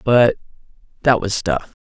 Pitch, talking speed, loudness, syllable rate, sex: 115 Hz, 130 wpm, -18 LUFS, 4.1 syllables/s, male